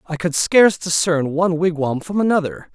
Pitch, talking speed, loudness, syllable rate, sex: 165 Hz, 175 wpm, -17 LUFS, 5.3 syllables/s, male